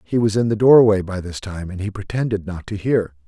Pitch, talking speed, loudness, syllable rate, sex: 100 Hz, 255 wpm, -19 LUFS, 5.5 syllables/s, male